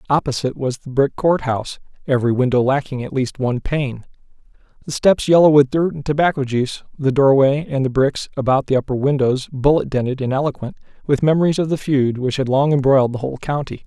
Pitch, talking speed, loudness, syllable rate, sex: 135 Hz, 195 wpm, -18 LUFS, 6.1 syllables/s, male